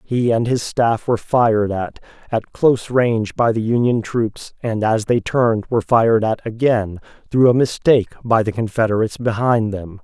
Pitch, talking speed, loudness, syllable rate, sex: 115 Hz, 180 wpm, -18 LUFS, 5.1 syllables/s, male